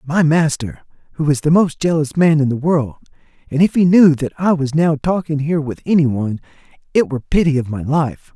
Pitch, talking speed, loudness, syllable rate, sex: 150 Hz, 215 wpm, -16 LUFS, 5.6 syllables/s, male